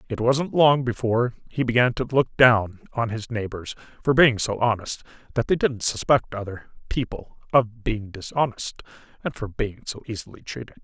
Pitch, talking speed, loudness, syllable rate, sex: 120 Hz, 170 wpm, -23 LUFS, 5.0 syllables/s, male